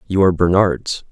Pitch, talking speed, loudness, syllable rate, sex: 90 Hz, 160 wpm, -16 LUFS, 5.3 syllables/s, male